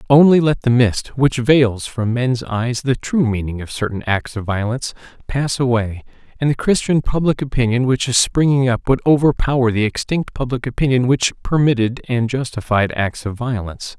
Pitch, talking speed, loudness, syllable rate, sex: 125 Hz, 175 wpm, -17 LUFS, 5.0 syllables/s, male